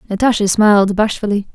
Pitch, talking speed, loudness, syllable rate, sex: 210 Hz, 115 wpm, -14 LUFS, 6.1 syllables/s, female